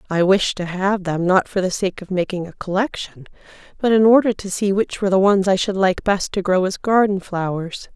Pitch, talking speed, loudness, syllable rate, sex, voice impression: 190 Hz, 235 wpm, -19 LUFS, 5.3 syllables/s, female, very feminine, slightly middle-aged, thin, slightly tensed, slightly weak, bright, slightly soft, clear, fluent, slightly raspy, slightly cute, intellectual, refreshing, sincere, very calm, very friendly, very reassuring, unique, elegant, slightly wild, sweet, kind, slightly sharp, light